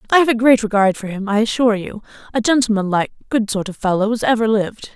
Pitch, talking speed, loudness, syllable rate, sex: 220 Hz, 240 wpm, -17 LUFS, 6.7 syllables/s, female